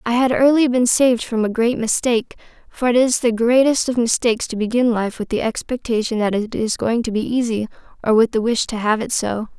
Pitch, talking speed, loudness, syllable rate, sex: 235 Hz, 230 wpm, -18 LUFS, 5.6 syllables/s, female